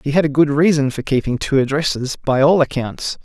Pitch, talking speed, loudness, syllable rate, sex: 140 Hz, 220 wpm, -17 LUFS, 5.5 syllables/s, male